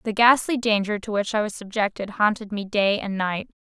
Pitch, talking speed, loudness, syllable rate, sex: 210 Hz, 215 wpm, -23 LUFS, 5.3 syllables/s, female